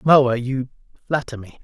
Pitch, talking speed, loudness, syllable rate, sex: 130 Hz, 145 wpm, -20 LUFS, 4.4 syllables/s, male